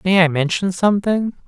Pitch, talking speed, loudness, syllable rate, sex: 185 Hz, 160 wpm, -17 LUFS, 5.4 syllables/s, male